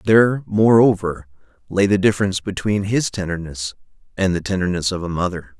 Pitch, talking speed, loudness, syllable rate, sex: 95 Hz, 150 wpm, -19 LUFS, 5.7 syllables/s, male